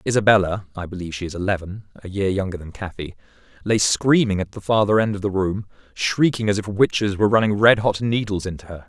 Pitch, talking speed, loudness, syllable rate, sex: 100 Hz, 195 wpm, -20 LUFS, 6.1 syllables/s, male